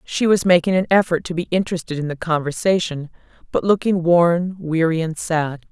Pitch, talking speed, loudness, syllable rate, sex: 170 Hz, 180 wpm, -19 LUFS, 5.3 syllables/s, female